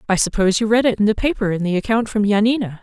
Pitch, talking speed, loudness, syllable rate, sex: 210 Hz, 275 wpm, -18 LUFS, 7.2 syllables/s, female